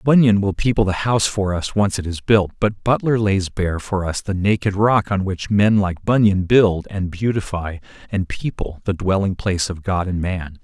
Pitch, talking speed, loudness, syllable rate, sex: 95 Hz, 210 wpm, -19 LUFS, 4.8 syllables/s, male